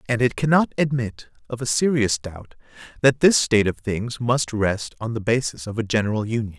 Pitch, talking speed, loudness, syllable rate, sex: 115 Hz, 200 wpm, -21 LUFS, 5.3 syllables/s, male